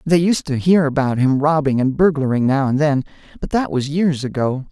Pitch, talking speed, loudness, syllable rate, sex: 145 Hz, 215 wpm, -17 LUFS, 5.2 syllables/s, male